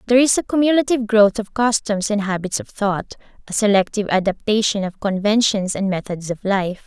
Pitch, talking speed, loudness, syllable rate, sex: 210 Hz, 175 wpm, -19 LUFS, 5.6 syllables/s, female